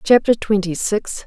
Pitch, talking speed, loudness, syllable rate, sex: 210 Hz, 145 wpm, -18 LUFS, 4.3 syllables/s, female